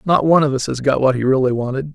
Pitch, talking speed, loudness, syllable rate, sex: 135 Hz, 310 wpm, -17 LUFS, 7.0 syllables/s, male